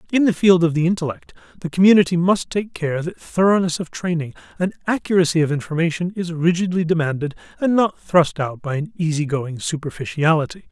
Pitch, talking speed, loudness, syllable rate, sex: 170 Hz, 175 wpm, -19 LUFS, 5.8 syllables/s, male